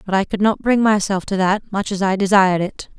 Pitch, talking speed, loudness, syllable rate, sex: 195 Hz, 260 wpm, -18 LUFS, 5.7 syllables/s, female